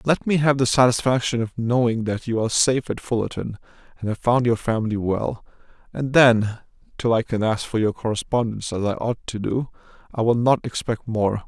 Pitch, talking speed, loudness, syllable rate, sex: 115 Hz, 200 wpm, -22 LUFS, 5.5 syllables/s, male